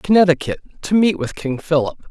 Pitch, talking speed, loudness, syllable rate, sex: 165 Hz, 170 wpm, -18 LUFS, 5.5 syllables/s, male